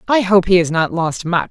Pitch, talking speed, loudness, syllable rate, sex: 180 Hz, 280 wpm, -15 LUFS, 5.2 syllables/s, female